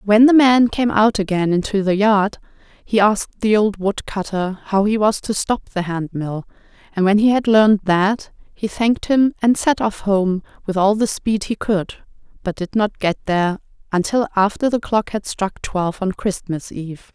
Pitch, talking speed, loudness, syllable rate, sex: 205 Hz, 200 wpm, -18 LUFS, 4.8 syllables/s, female